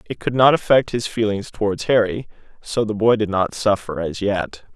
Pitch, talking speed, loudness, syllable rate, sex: 105 Hz, 200 wpm, -19 LUFS, 5.0 syllables/s, male